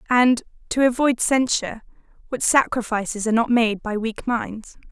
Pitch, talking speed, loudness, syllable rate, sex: 235 Hz, 145 wpm, -21 LUFS, 4.9 syllables/s, female